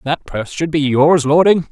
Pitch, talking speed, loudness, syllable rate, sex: 150 Hz, 210 wpm, -14 LUFS, 5.2 syllables/s, male